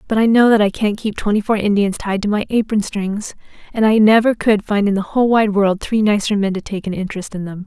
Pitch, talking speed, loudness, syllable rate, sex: 205 Hz, 265 wpm, -16 LUFS, 5.9 syllables/s, female